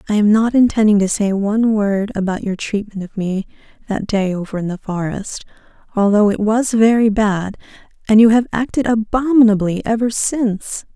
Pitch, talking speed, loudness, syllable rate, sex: 210 Hz, 170 wpm, -16 LUFS, 5.1 syllables/s, female